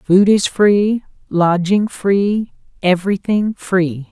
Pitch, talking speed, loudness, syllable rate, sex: 195 Hz, 75 wpm, -16 LUFS, 3.1 syllables/s, female